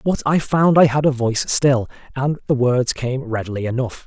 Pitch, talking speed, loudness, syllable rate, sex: 130 Hz, 205 wpm, -18 LUFS, 5.1 syllables/s, male